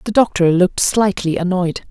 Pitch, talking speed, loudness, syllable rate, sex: 185 Hz, 160 wpm, -16 LUFS, 5.1 syllables/s, female